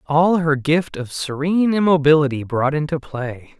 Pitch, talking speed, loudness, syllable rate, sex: 150 Hz, 150 wpm, -18 LUFS, 4.6 syllables/s, male